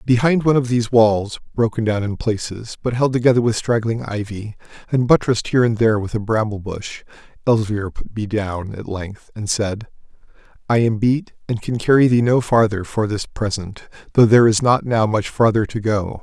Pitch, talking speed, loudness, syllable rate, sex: 110 Hz, 195 wpm, -18 LUFS, 5.3 syllables/s, male